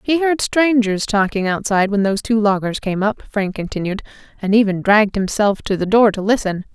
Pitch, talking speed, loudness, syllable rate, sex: 210 Hz, 195 wpm, -17 LUFS, 5.5 syllables/s, female